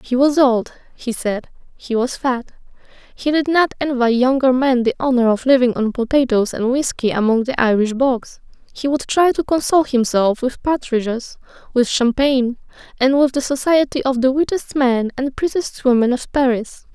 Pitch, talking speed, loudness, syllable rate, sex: 255 Hz, 175 wpm, -17 LUFS, 4.9 syllables/s, female